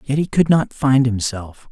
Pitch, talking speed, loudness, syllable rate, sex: 130 Hz, 210 wpm, -17 LUFS, 4.4 syllables/s, male